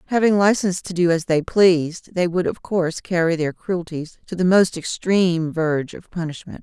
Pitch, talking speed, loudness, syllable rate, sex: 175 Hz, 190 wpm, -20 LUFS, 5.2 syllables/s, female